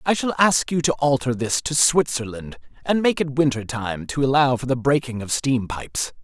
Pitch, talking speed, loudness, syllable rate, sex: 135 Hz, 210 wpm, -21 LUFS, 5.0 syllables/s, male